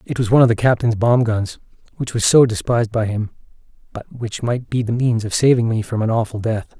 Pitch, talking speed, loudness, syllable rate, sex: 115 Hz, 240 wpm, -18 LUFS, 5.8 syllables/s, male